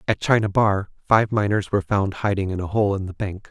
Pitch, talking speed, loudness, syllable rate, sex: 100 Hz, 240 wpm, -21 LUFS, 5.6 syllables/s, male